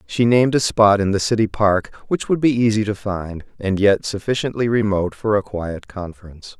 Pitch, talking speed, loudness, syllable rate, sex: 105 Hz, 200 wpm, -19 LUFS, 5.3 syllables/s, male